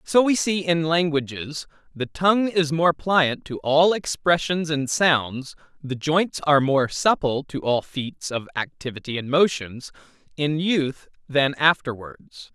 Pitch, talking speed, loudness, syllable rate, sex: 150 Hz, 150 wpm, -22 LUFS, 3.9 syllables/s, male